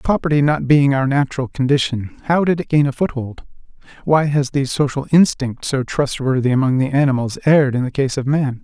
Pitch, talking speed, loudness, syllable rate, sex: 140 Hz, 195 wpm, -17 LUFS, 5.6 syllables/s, male